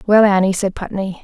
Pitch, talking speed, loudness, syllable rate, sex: 195 Hz, 195 wpm, -16 LUFS, 5.5 syllables/s, female